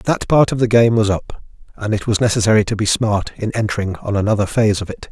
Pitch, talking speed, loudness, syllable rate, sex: 110 Hz, 235 wpm, -17 LUFS, 6.2 syllables/s, male